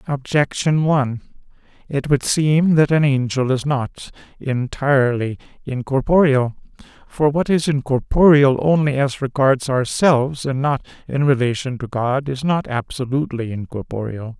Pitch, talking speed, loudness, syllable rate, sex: 135 Hz, 125 wpm, -18 LUFS, 4.5 syllables/s, male